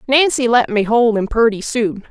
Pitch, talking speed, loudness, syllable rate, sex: 235 Hz, 200 wpm, -15 LUFS, 4.6 syllables/s, female